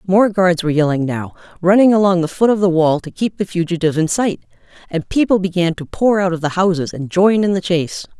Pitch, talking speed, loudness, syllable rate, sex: 180 Hz, 235 wpm, -16 LUFS, 6.0 syllables/s, female